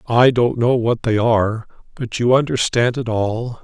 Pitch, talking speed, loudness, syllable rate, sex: 115 Hz, 180 wpm, -17 LUFS, 4.4 syllables/s, male